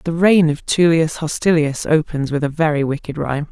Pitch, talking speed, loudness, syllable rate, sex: 155 Hz, 190 wpm, -17 LUFS, 5.3 syllables/s, female